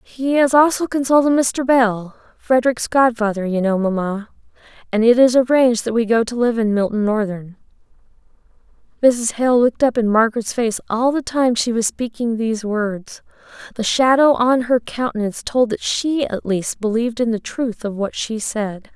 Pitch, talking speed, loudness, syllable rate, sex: 235 Hz, 175 wpm, -18 LUFS, 4.9 syllables/s, female